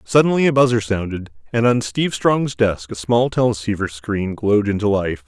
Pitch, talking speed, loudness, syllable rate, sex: 110 Hz, 180 wpm, -18 LUFS, 5.2 syllables/s, male